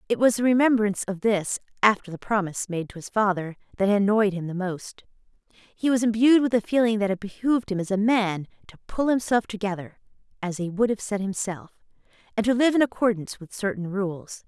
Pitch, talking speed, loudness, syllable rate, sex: 205 Hz, 205 wpm, -24 LUFS, 5.8 syllables/s, female